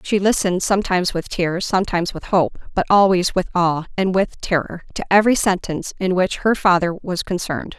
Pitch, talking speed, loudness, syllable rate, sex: 185 Hz, 185 wpm, -19 LUFS, 5.8 syllables/s, female